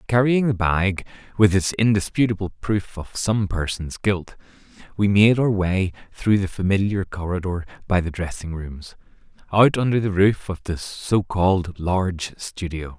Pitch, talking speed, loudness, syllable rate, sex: 95 Hz, 150 wpm, -21 LUFS, 4.5 syllables/s, male